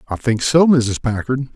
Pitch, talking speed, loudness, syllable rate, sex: 125 Hz, 195 wpm, -16 LUFS, 4.4 syllables/s, male